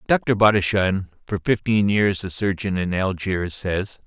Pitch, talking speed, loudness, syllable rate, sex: 95 Hz, 150 wpm, -21 LUFS, 4.0 syllables/s, male